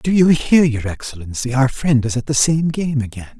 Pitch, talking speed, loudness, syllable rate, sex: 135 Hz, 230 wpm, -17 LUFS, 5.2 syllables/s, male